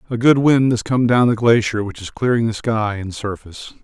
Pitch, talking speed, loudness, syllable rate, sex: 115 Hz, 235 wpm, -17 LUFS, 5.4 syllables/s, male